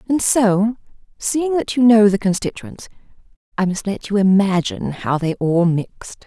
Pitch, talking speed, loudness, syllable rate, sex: 205 Hz, 165 wpm, -17 LUFS, 4.6 syllables/s, female